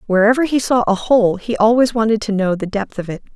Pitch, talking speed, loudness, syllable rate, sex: 220 Hz, 250 wpm, -16 LUFS, 5.9 syllables/s, female